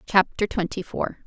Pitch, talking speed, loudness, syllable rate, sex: 195 Hz, 145 wpm, -25 LUFS, 4.4 syllables/s, female